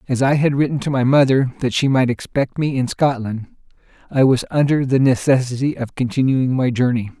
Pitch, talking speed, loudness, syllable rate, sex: 130 Hz, 190 wpm, -18 LUFS, 5.3 syllables/s, male